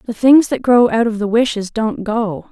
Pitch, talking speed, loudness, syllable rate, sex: 225 Hz, 240 wpm, -15 LUFS, 4.7 syllables/s, female